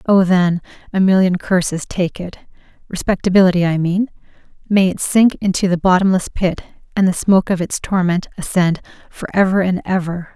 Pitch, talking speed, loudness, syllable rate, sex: 185 Hz, 155 wpm, -16 LUFS, 5.4 syllables/s, female